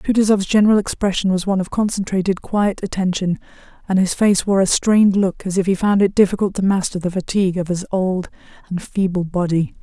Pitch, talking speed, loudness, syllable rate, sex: 190 Hz, 195 wpm, -18 LUFS, 5.9 syllables/s, female